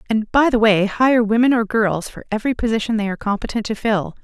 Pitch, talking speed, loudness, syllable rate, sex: 220 Hz, 225 wpm, -18 LUFS, 6.1 syllables/s, female